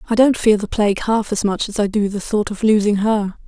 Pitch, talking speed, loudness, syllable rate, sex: 210 Hz, 275 wpm, -17 LUFS, 5.6 syllables/s, female